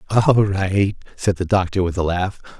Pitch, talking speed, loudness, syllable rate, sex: 95 Hz, 185 wpm, -19 LUFS, 5.3 syllables/s, male